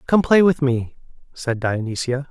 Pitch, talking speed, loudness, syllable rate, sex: 135 Hz, 155 wpm, -19 LUFS, 4.5 syllables/s, male